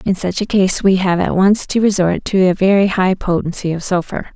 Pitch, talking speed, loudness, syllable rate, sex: 190 Hz, 235 wpm, -15 LUFS, 5.2 syllables/s, female